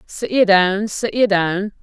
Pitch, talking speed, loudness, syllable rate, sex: 205 Hz, 195 wpm, -17 LUFS, 3.7 syllables/s, female